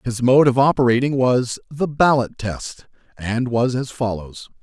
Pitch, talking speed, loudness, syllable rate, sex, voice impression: 125 Hz, 155 wpm, -19 LUFS, 4.3 syllables/s, male, very masculine, slightly old, very thick, very tensed, powerful, bright, slightly soft, very clear, fluent, slightly raspy, very cool, intellectual, refreshing, very sincere, calm, mature, very friendly, very reassuring, very unique, elegant, wild, slightly sweet, very lively, slightly kind, intense